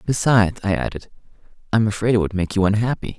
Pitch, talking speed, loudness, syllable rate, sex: 105 Hz, 190 wpm, -20 LUFS, 6.6 syllables/s, male